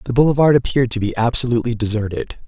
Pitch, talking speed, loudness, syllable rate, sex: 120 Hz, 170 wpm, -17 LUFS, 7.4 syllables/s, male